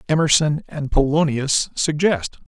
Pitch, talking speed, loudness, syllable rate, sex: 150 Hz, 95 wpm, -19 LUFS, 4.2 syllables/s, male